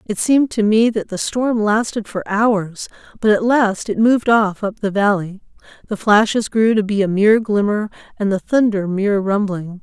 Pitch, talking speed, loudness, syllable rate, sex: 210 Hz, 195 wpm, -17 LUFS, 4.9 syllables/s, female